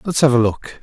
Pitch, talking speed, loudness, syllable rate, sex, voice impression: 135 Hz, 290 wpm, -16 LUFS, 6.6 syllables/s, male, masculine, adult-like, slightly halting, slightly refreshing, slightly wild